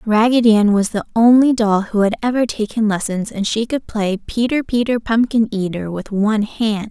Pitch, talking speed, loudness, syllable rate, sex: 220 Hz, 190 wpm, -17 LUFS, 5.1 syllables/s, female